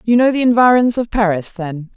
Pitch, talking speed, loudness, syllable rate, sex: 215 Hz, 215 wpm, -14 LUFS, 5.4 syllables/s, female